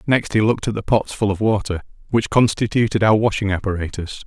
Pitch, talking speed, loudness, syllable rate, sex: 105 Hz, 195 wpm, -19 LUFS, 6.0 syllables/s, male